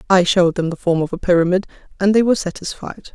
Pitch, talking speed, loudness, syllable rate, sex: 185 Hz, 230 wpm, -17 LUFS, 6.8 syllables/s, female